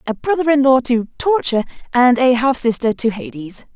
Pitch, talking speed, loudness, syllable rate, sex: 255 Hz, 190 wpm, -16 LUFS, 5.4 syllables/s, female